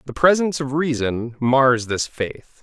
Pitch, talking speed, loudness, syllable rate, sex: 135 Hz, 160 wpm, -20 LUFS, 4.1 syllables/s, male